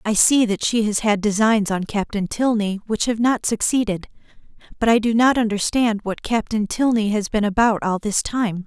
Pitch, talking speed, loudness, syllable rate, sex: 215 Hz, 195 wpm, -20 LUFS, 4.9 syllables/s, female